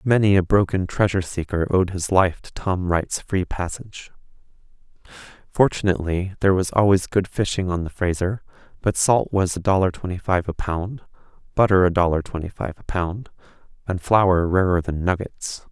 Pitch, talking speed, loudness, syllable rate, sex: 90 Hz, 165 wpm, -21 LUFS, 5.2 syllables/s, male